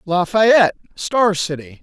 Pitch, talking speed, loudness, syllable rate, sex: 185 Hz, 100 wpm, -16 LUFS, 4.0 syllables/s, male